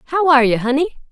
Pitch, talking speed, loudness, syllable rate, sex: 260 Hz, 215 wpm, -15 LUFS, 7.5 syllables/s, female